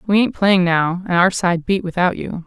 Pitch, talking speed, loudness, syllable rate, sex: 185 Hz, 245 wpm, -17 LUFS, 4.8 syllables/s, female